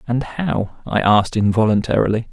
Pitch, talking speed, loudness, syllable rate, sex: 110 Hz, 130 wpm, -18 LUFS, 5.3 syllables/s, male